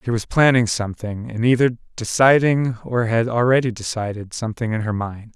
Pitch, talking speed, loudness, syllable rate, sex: 115 Hz, 170 wpm, -19 LUFS, 5.2 syllables/s, male